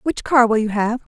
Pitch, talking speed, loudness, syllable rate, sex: 235 Hz, 260 wpm, -18 LUFS, 5.3 syllables/s, female